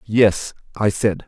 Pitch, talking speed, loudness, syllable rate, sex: 105 Hz, 140 wpm, -19 LUFS, 3.2 syllables/s, male